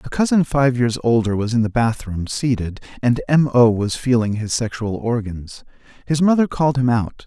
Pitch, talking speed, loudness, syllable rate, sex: 120 Hz, 190 wpm, -19 LUFS, 5.0 syllables/s, male